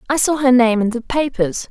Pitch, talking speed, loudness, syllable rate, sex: 245 Hz, 245 wpm, -16 LUFS, 5.2 syllables/s, female